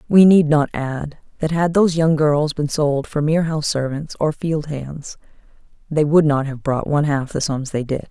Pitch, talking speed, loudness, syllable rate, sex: 150 Hz, 215 wpm, -18 LUFS, 4.9 syllables/s, female